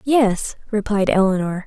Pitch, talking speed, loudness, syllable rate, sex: 205 Hz, 110 wpm, -19 LUFS, 4.2 syllables/s, female